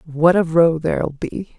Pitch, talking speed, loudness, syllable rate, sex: 165 Hz, 190 wpm, -18 LUFS, 4.1 syllables/s, female